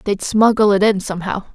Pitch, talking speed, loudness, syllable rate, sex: 200 Hz, 195 wpm, -16 LUFS, 5.8 syllables/s, female